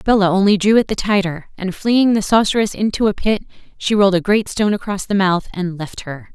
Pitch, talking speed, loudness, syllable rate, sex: 200 Hz, 225 wpm, -17 LUFS, 5.9 syllables/s, female